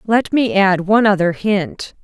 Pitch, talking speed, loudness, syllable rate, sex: 195 Hz, 175 wpm, -15 LUFS, 4.4 syllables/s, female